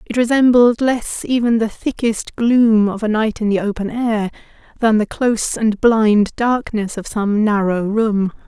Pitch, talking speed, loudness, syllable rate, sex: 220 Hz, 170 wpm, -16 LUFS, 4.2 syllables/s, female